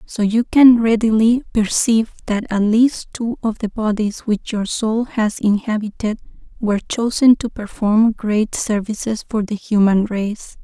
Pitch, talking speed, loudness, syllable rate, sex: 220 Hz, 150 wpm, -17 LUFS, 4.2 syllables/s, female